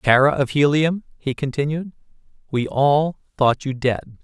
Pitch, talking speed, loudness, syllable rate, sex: 140 Hz, 140 wpm, -20 LUFS, 4.3 syllables/s, male